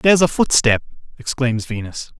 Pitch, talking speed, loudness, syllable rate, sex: 135 Hz, 135 wpm, -18 LUFS, 5.2 syllables/s, male